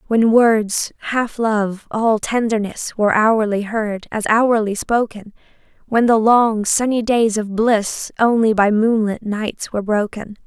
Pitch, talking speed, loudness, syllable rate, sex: 220 Hz, 145 wpm, -17 LUFS, 3.9 syllables/s, female